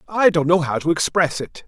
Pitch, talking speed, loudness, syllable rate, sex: 165 Hz, 250 wpm, -18 LUFS, 5.4 syllables/s, male